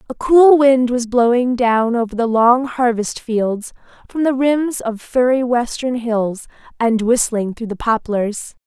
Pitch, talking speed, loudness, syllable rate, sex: 240 Hz, 160 wpm, -16 LUFS, 3.9 syllables/s, female